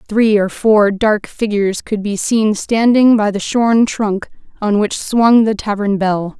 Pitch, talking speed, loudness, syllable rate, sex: 210 Hz, 180 wpm, -14 LUFS, 3.9 syllables/s, female